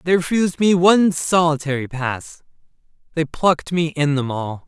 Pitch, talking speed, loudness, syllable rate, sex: 160 Hz, 155 wpm, -18 LUFS, 5.0 syllables/s, male